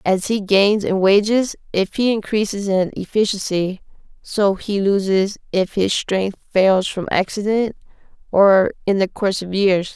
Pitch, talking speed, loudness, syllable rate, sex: 200 Hz, 150 wpm, -18 LUFS, 4.2 syllables/s, female